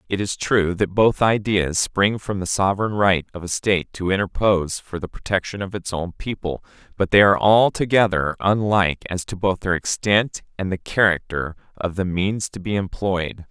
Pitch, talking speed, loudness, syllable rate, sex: 95 Hz, 185 wpm, -21 LUFS, 5.0 syllables/s, male